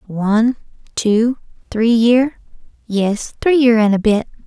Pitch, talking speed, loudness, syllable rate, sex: 225 Hz, 135 wpm, -15 LUFS, 3.6 syllables/s, female